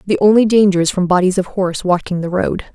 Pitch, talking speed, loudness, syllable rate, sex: 190 Hz, 240 wpm, -15 LUFS, 6.1 syllables/s, female